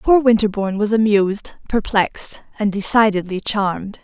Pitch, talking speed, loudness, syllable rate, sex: 210 Hz, 120 wpm, -18 LUFS, 5.3 syllables/s, female